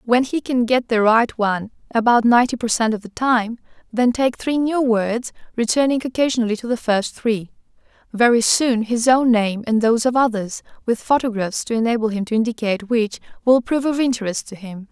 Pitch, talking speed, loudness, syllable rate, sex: 230 Hz, 195 wpm, -19 LUFS, 5.5 syllables/s, female